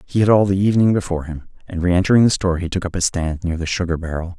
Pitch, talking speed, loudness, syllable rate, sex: 90 Hz, 275 wpm, -18 LUFS, 7.2 syllables/s, male